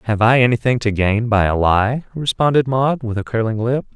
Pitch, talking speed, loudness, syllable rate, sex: 115 Hz, 210 wpm, -17 LUFS, 5.3 syllables/s, male